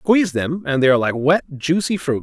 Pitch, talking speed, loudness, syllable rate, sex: 155 Hz, 240 wpm, -18 LUFS, 5.6 syllables/s, male